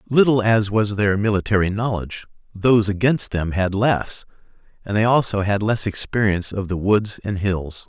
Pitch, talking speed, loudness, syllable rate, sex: 105 Hz, 170 wpm, -20 LUFS, 5.0 syllables/s, male